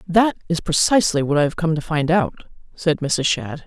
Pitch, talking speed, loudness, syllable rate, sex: 165 Hz, 215 wpm, -19 LUFS, 5.4 syllables/s, female